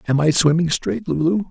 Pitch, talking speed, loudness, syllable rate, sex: 165 Hz, 200 wpm, -18 LUFS, 5.2 syllables/s, male